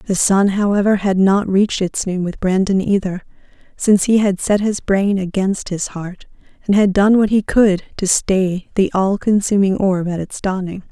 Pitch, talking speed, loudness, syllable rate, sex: 195 Hz, 190 wpm, -16 LUFS, 4.6 syllables/s, female